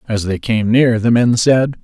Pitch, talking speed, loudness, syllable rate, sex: 115 Hz, 230 wpm, -14 LUFS, 4.4 syllables/s, male